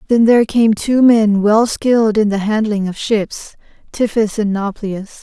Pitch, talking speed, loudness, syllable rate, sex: 215 Hz, 160 wpm, -14 LUFS, 4.3 syllables/s, female